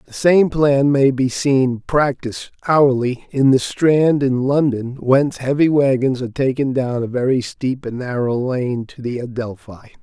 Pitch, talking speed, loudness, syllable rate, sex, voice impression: 130 Hz, 170 wpm, -17 LUFS, 4.4 syllables/s, male, masculine, middle-aged, slightly soft, sincere, slightly calm, slightly wild